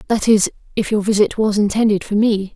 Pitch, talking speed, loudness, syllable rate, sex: 210 Hz, 210 wpm, -17 LUFS, 5.7 syllables/s, female